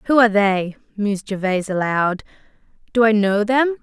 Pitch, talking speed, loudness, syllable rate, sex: 210 Hz, 155 wpm, -18 LUFS, 5.2 syllables/s, female